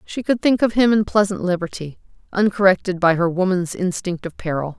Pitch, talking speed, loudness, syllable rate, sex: 190 Hz, 190 wpm, -19 LUFS, 5.5 syllables/s, female